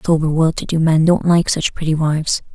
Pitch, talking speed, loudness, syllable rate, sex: 160 Hz, 235 wpm, -16 LUFS, 5.6 syllables/s, female